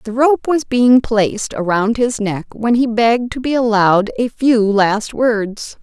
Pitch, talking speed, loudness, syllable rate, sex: 230 Hz, 185 wpm, -15 LUFS, 4.0 syllables/s, female